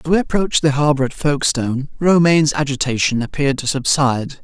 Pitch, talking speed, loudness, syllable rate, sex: 140 Hz, 160 wpm, -17 LUFS, 6.4 syllables/s, male